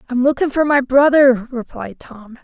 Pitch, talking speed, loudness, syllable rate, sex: 260 Hz, 170 wpm, -14 LUFS, 4.5 syllables/s, female